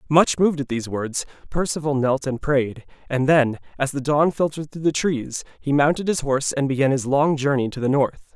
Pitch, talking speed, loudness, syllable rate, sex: 140 Hz, 215 wpm, -21 LUFS, 5.5 syllables/s, male